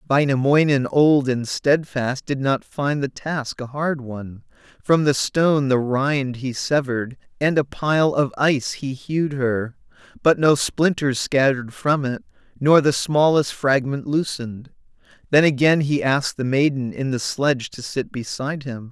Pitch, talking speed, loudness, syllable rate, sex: 140 Hz, 160 wpm, -20 LUFS, 4.5 syllables/s, male